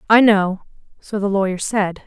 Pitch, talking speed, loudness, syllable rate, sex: 200 Hz, 145 wpm, -18 LUFS, 4.5 syllables/s, female